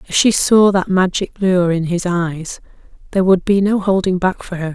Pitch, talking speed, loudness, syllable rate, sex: 185 Hz, 215 wpm, -15 LUFS, 4.9 syllables/s, female